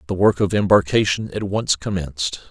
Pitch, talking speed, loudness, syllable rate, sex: 95 Hz, 170 wpm, -19 LUFS, 5.3 syllables/s, male